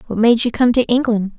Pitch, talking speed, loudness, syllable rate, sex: 230 Hz, 260 wpm, -15 LUFS, 6.0 syllables/s, female